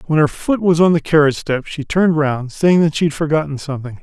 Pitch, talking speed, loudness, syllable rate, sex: 155 Hz, 255 wpm, -16 LUFS, 6.2 syllables/s, male